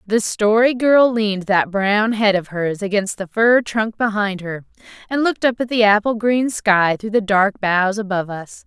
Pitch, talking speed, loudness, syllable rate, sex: 210 Hz, 200 wpm, -17 LUFS, 4.6 syllables/s, female